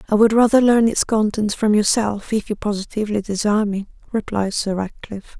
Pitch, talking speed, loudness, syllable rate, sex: 210 Hz, 180 wpm, -19 LUFS, 5.8 syllables/s, female